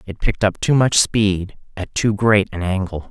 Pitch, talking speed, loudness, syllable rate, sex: 100 Hz, 210 wpm, -18 LUFS, 4.7 syllables/s, male